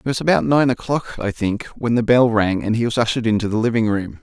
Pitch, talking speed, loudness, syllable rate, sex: 115 Hz, 270 wpm, -18 LUFS, 6.1 syllables/s, male